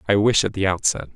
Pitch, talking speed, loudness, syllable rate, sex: 100 Hz, 260 wpm, -20 LUFS, 6.5 syllables/s, male